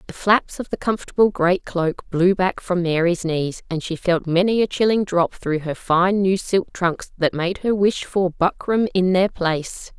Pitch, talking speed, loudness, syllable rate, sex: 180 Hz, 205 wpm, -20 LUFS, 4.4 syllables/s, female